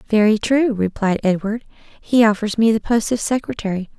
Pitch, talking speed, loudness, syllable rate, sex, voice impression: 220 Hz, 165 wpm, -18 LUFS, 5.3 syllables/s, female, feminine, young, slightly weak, clear, slightly cute, refreshing, slightly sweet, slightly lively, kind, slightly modest